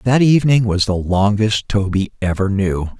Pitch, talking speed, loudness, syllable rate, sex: 105 Hz, 160 wpm, -16 LUFS, 4.6 syllables/s, male